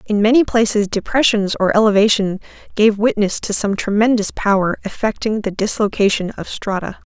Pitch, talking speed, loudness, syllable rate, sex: 210 Hz, 145 wpm, -16 LUFS, 5.2 syllables/s, female